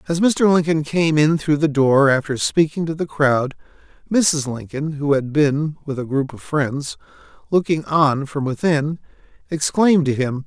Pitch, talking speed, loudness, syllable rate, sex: 150 Hz, 160 wpm, -19 LUFS, 4.4 syllables/s, male